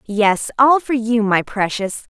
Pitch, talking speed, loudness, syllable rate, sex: 225 Hz, 170 wpm, -17 LUFS, 3.7 syllables/s, female